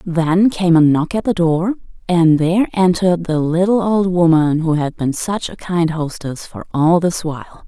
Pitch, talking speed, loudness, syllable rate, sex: 170 Hz, 195 wpm, -16 LUFS, 4.6 syllables/s, female